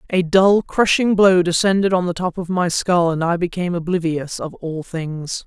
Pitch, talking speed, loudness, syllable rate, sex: 175 Hz, 200 wpm, -18 LUFS, 4.8 syllables/s, female